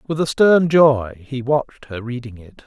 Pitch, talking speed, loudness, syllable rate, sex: 130 Hz, 205 wpm, -17 LUFS, 4.6 syllables/s, male